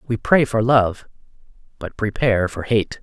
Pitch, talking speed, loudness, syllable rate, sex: 115 Hz, 160 wpm, -19 LUFS, 4.6 syllables/s, male